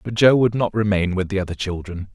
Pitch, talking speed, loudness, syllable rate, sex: 100 Hz, 250 wpm, -20 LUFS, 5.9 syllables/s, male